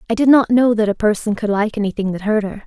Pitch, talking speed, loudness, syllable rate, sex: 215 Hz, 295 wpm, -16 LUFS, 6.6 syllables/s, female